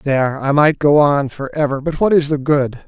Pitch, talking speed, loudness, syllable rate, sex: 145 Hz, 250 wpm, -15 LUFS, 5.0 syllables/s, male